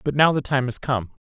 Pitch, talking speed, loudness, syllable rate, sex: 135 Hz, 285 wpm, -22 LUFS, 5.7 syllables/s, male